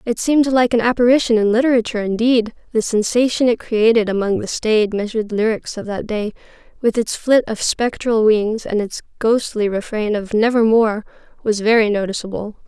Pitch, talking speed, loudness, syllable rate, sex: 225 Hz, 165 wpm, -17 LUFS, 5.4 syllables/s, female